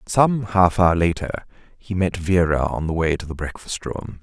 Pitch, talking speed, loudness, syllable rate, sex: 90 Hz, 200 wpm, -21 LUFS, 4.5 syllables/s, male